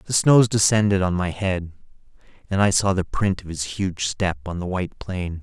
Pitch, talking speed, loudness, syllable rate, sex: 95 Hz, 210 wpm, -21 LUFS, 4.8 syllables/s, male